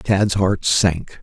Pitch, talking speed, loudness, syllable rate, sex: 95 Hz, 145 wpm, -18 LUFS, 2.5 syllables/s, male